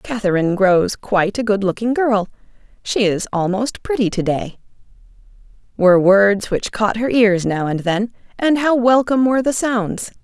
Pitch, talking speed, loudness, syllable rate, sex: 215 Hz, 150 wpm, -17 LUFS, 4.9 syllables/s, female